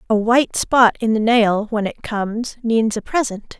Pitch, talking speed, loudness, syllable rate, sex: 225 Hz, 200 wpm, -18 LUFS, 4.6 syllables/s, female